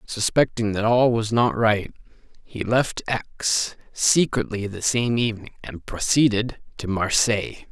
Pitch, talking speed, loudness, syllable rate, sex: 110 Hz, 130 wpm, -22 LUFS, 4.1 syllables/s, male